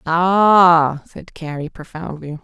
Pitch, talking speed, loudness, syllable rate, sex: 165 Hz, 100 wpm, -14 LUFS, 3.0 syllables/s, female